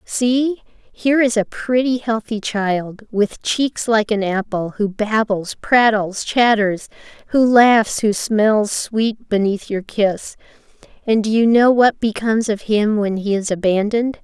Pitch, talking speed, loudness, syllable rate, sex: 220 Hz, 150 wpm, -17 LUFS, 3.8 syllables/s, female